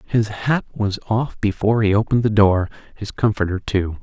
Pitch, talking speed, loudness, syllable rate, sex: 105 Hz, 180 wpm, -19 LUFS, 5.2 syllables/s, male